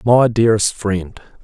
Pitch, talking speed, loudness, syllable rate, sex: 110 Hz, 125 wpm, -16 LUFS, 4.4 syllables/s, male